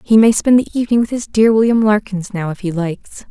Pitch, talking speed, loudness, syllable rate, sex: 210 Hz, 255 wpm, -15 LUFS, 6.1 syllables/s, female